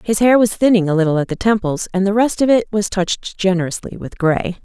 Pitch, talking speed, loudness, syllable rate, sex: 195 Hz, 245 wpm, -16 LUFS, 5.9 syllables/s, female